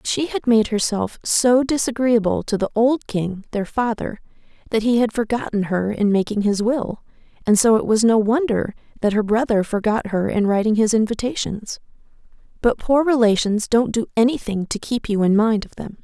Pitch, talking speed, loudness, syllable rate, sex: 220 Hz, 185 wpm, -19 LUFS, 5.0 syllables/s, female